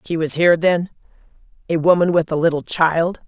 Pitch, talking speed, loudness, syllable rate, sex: 165 Hz, 165 wpm, -17 LUFS, 5.5 syllables/s, female